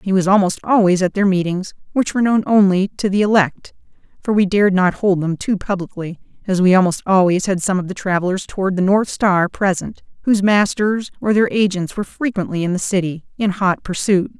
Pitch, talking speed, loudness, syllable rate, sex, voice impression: 190 Hz, 205 wpm, -17 LUFS, 5.6 syllables/s, female, very feminine, middle-aged, thin, tensed, slightly powerful, bright, slightly hard, very clear, very fluent, cool, intellectual, very refreshing, sincere, calm, friendly, reassuring, slightly unique, elegant, wild, slightly sweet, lively, slightly strict, intense, slightly sharp